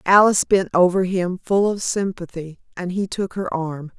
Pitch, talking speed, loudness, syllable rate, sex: 185 Hz, 180 wpm, -20 LUFS, 4.7 syllables/s, female